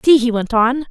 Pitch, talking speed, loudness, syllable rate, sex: 245 Hz, 265 wpm, -15 LUFS, 5.1 syllables/s, female